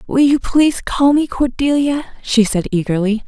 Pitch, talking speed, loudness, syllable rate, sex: 255 Hz, 165 wpm, -15 LUFS, 4.8 syllables/s, female